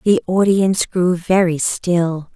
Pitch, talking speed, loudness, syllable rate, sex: 180 Hz, 125 wpm, -16 LUFS, 3.7 syllables/s, female